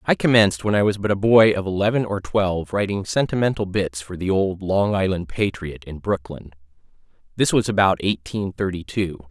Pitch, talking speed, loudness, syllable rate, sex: 100 Hz, 185 wpm, -21 LUFS, 5.3 syllables/s, male